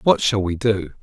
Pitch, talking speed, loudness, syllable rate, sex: 105 Hz, 235 wpm, -20 LUFS, 4.8 syllables/s, male